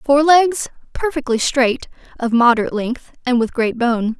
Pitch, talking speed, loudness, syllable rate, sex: 255 Hz, 145 wpm, -17 LUFS, 4.6 syllables/s, female